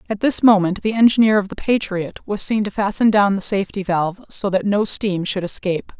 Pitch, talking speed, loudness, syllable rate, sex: 200 Hz, 220 wpm, -18 LUFS, 5.6 syllables/s, female